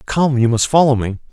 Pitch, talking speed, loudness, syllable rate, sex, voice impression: 125 Hz, 225 wpm, -15 LUFS, 5.5 syllables/s, male, very masculine, middle-aged, very thick, slightly tensed, slightly powerful, slightly dark, soft, slightly clear, fluent, slightly raspy, cool, very intellectual, refreshing, sincere, very calm, mature, very friendly, very reassuring, slightly unique, slightly elegant, wild, very sweet, lively, kind, modest